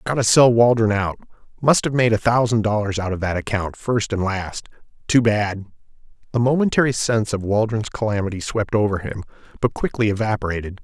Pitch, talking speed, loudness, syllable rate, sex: 110 Hz, 170 wpm, -20 LUFS, 5.7 syllables/s, male